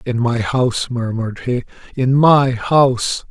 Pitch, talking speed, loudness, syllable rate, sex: 125 Hz, 145 wpm, -16 LUFS, 4.3 syllables/s, male